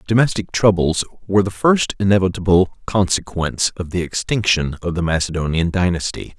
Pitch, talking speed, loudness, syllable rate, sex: 95 Hz, 130 wpm, -18 LUFS, 5.5 syllables/s, male